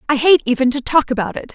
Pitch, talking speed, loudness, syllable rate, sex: 265 Hz, 270 wpm, -16 LUFS, 6.8 syllables/s, female